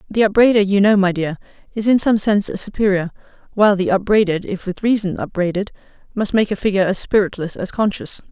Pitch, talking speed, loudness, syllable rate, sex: 200 Hz, 195 wpm, -17 LUFS, 6.3 syllables/s, female